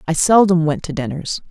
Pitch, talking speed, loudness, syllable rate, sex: 165 Hz, 200 wpm, -16 LUFS, 5.4 syllables/s, female